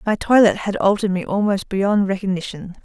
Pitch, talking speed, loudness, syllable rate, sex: 200 Hz, 170 wpm, -18 LUFS, 5.6 syllables/s, female